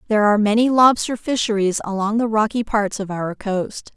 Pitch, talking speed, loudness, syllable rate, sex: 215 Hz, 180 wpm, -19 LUFS, 5.4 syllables/s, female